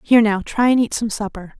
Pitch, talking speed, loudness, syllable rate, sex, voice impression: 220 Hz, 265 wpm, -18 LUFS, 6.0 syllables/s, female, very feminine, slightly adult-like, thin, tensed, powerful, slightly bright, slightly soft, very clear, very fluent, cool, very intellectual, refreshing, very sincere, calm, friendly, reassuring, unique, slightly elegant, wild, sweet, slightly lively, slightly strict, slightly intense